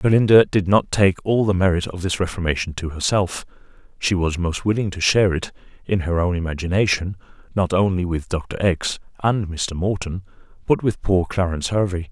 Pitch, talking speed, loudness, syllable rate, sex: 90 Hz, 175 wpm, -20 LUFS, 5.3 syllables/s, male